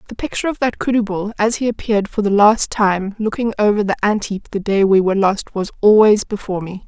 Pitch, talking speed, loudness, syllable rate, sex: 210 Hz, 235 wpm, -17 LUFS, 6.0 syllables/s, female